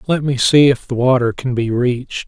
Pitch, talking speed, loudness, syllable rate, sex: 130 Hz, 235 wpm, -15 LUFS, 5.1 syllables/s, male